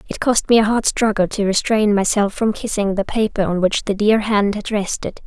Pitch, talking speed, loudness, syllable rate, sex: 210 Hz, 230 wpm, -18 LUFS, 5.1 syllables/s, female